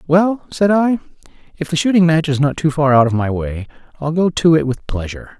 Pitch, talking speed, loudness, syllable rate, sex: 155 Hz, 235 wpm, -16 LUFS, 5.7 syllables/s, male